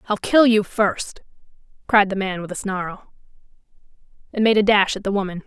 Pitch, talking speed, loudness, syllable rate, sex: 200 Hz, 185 wpm, -19 LUFS, 5.2 syllables/s, female